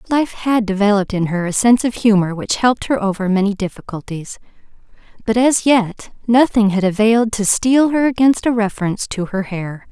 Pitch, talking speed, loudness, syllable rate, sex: 215 Hz, 180 wpm, -16 LUFS, 5.5 syllables/s, female